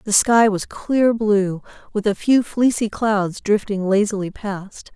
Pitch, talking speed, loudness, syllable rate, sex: 210 Hz, 155 wpm, -19 LUFS, 3.8 syllables/s, female